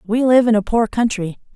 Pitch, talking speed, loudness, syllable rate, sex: 225 Hz, 230 wpm, -16 LUFS, 5.6 syllables/s, female